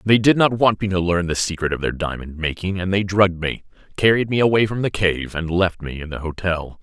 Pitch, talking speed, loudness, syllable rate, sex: 90 Hz, 255 wpm, -20 LUFS, 5.6 syllables/s, male